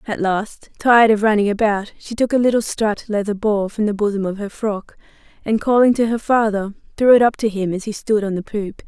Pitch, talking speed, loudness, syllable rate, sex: 215 Hz, 235 wpm, -18 LUFS, 5.6 syllables/s, female